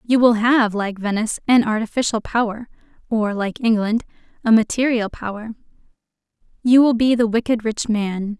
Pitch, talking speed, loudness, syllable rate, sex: 225 Hz, 150 wpm, -19 LUFS, 5.0 syllables/s, female